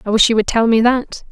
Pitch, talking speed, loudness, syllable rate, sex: 225 Hz, 320 wpm, -14 LUFS, 6.0 syllables/s, female